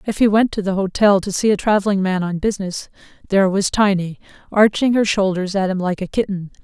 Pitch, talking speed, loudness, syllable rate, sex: 195 Hz, 215 wpm, -18 LUFS, 5.9 syllables/s, female